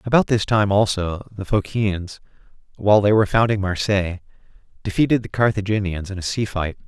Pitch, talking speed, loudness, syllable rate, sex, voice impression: 100 Hz, 155 wpm, -20 LUFS, 5.7 syllables/s, male, very masculine, very adult-like, middle-aged, very thick, slightly relaxed, slightly powerful, slightly dark, slightly soft, slightly clear, fluent, cool, very intellectual, slightly refreshing, sincere, very calm, friendly, very reassuring, slightly unique, slightly elegant, sweet, slightly lively, kind, slightly modest